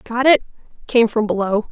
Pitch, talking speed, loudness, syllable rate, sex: 230 Hz, 175 wpm, -17 LUFS, 4.8 syllables/s, female